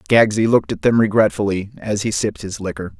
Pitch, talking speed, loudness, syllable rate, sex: 105 Hz, 200 wpm, -18 LUFS, 5.9 syllables/s, male